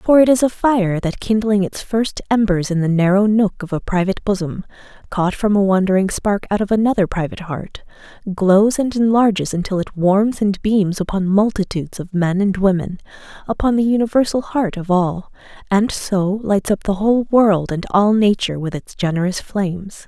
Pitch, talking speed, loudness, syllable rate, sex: 200 Hz, 185 wpm, -17 LUFS, 5.1 syllables/s, female